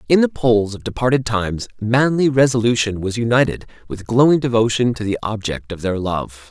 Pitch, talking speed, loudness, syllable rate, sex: 115 Hz, 175 wpm, -18 LUFS, 5.5 syllables/s, male